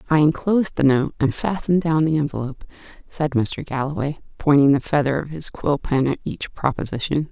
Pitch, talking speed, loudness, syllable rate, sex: 145 Hz, 180 wpm, -21 LUFS, 5.6 syllables/s, female